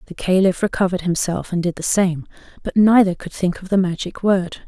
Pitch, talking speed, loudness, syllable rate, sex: 185 Hz, 205 wpm, -19 LUFS, 5.7 syllables/s, female